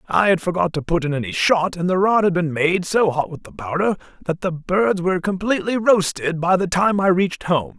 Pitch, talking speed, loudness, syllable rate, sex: 180 Hz, 240 wpm, -19 LUFS, 5.5 syllables/s, male